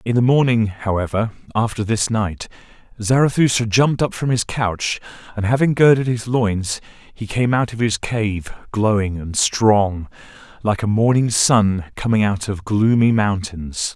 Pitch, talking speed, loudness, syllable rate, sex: 110 Hz, 155 wpm, -18 LUFS, 4.3 syllables/s, male